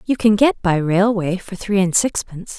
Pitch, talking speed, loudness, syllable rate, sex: 195 Hz, 210 wpm, -17 LUFS, 4.8 syllables/s, female